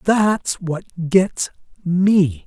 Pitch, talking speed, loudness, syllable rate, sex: 180 Hz, 95 wpm, -19 LUFS, 2.0 syllables/s, male